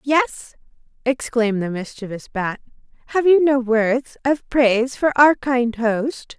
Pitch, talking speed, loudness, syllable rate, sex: 245 Hz, 140 wpm, -19 LUFS, 3.9 syllables/s, female